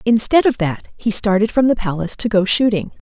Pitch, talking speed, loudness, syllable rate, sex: 210 Hz, 215 wpm, -16 LUFS, 5.8 syllables/s, female